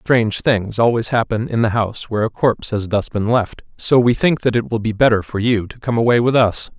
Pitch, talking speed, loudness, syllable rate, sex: 115 Hz, 255 wpm, -17 LUFS, 5.6 syllables/s, male